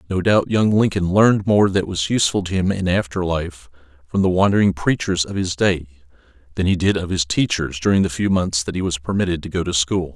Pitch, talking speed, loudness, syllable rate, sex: 90 Hz, 230 wpm, -19 LUFS, 5.7 syllables/s, male